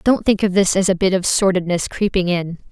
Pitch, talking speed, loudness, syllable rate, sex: 190 Hz, 245 wpm, -17 LUFS, 5.6 syllables/s, female